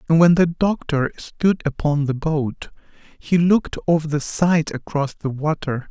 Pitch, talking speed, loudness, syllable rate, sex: 155 Hz, 165 wpm, -20 LUFS, 4.3 syllables/s, male